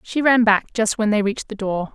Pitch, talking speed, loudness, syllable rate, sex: 215 Hz, 275 wpm, -19 LUFS, 5.7 syllables/s, female